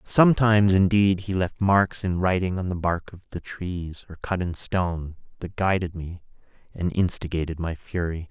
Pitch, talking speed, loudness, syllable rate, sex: 90 Hz, 175 wpm, -24 LUFS, 4.8 syllables/s, male